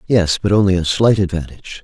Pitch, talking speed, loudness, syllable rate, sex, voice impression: 95 Hz, 195 wpm, -16 LUFS, 6.1 syllables/s, male, adult-like, slightly relaxed, powerful, hard, clear, raspy, cool, intellectual, calm, slightly mature, reassuring, wild, slightly lively, kind, slightly sharp, modest